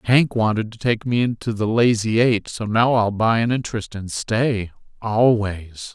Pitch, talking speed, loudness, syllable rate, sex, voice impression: 115 Hz, 170 wpm, -20 LUFS, 4.4 syllables/s, male, masculine, middle-aged, relaxed, slightly dark, slightly muffled, halting, calm, mature, slightly friendly, reassuring, wild, slightly strict, modest